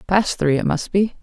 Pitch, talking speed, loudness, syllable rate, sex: 180 Hz, 245 wpm, -19 LUFS, 4.7 syllables/s, female